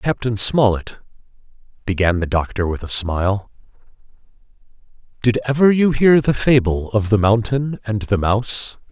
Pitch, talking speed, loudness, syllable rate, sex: 110 Hz, 135 wpm, -18 LUFS, 4.7 syllables/s, male